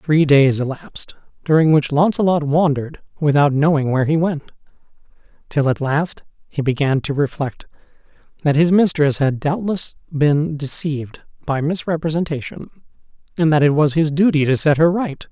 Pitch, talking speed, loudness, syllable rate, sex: 150 Hz, 150 wpm, -17 LUFS, 5.1 syllables/s, male